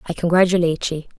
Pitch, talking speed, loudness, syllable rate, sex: 170 Hz, 150 wpm, -18 LUFS, 6.9 syllables/s, female